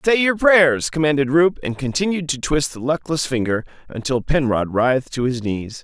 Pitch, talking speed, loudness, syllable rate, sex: 145 Hz, 185 wpm, -19 LUFS, 5.0 syllables/s, male